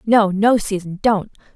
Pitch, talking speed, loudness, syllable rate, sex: 205 Hz, 115 wpm, -18 LUFS, 4.2 syllables/s, female